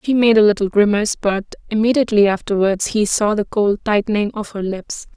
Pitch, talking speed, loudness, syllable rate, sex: 210 Hz, 185 wpm, -17 LUFS, 5.6 syllables/s, female